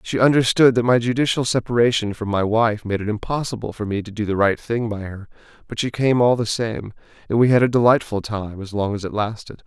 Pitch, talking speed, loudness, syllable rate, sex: 115 Hz, 230 wpm, -20 LUFS, 5.8 syllables/s, male